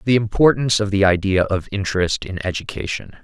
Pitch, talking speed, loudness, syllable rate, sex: 100 Hz, 165 wpm, -19 LUFS, 5.9 syllables/s, male